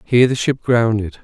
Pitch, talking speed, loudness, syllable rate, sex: 115 Hz, 195 wpm, -16 LUFS, 5.3 syllables/s, male